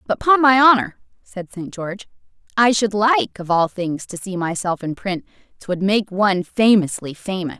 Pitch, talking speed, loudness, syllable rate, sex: 200 Hz, 180 wpm, -18 LUFS, 4.7 syllables/s, female